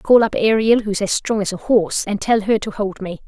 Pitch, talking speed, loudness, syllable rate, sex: 205 Hz, 295 wpm, -18 LUFS, 5.7 syllables/s, female